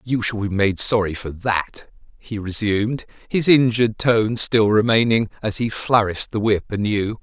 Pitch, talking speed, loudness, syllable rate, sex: 110 Hz, 165 wpm, -19 LUFS, 4.6 syllables/s, male